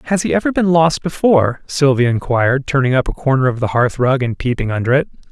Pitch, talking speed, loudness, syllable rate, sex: 135 Hz, 225 wpm, -15 LUFS, 6.2 syllables/s, male